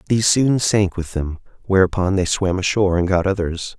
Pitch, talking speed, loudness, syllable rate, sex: 95 Hz, 190 wpm, -18 LUFS, 5.4 syllables/s, male